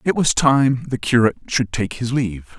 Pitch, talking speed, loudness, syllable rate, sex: 120 Hz, 210 wpm, -19 LUFS, 5.3 syllables/s, male